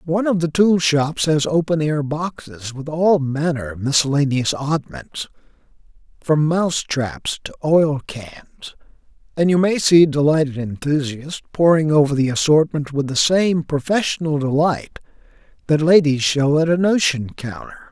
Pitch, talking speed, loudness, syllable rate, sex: 150 Hz, 145 wpm, -18 LUFS, 4.4 syllables/s, male